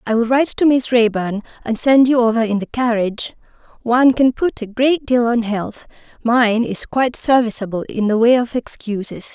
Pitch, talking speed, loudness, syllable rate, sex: 235 Hz, 185 wpm, -17 LUFS, 5.1 syllables/s, female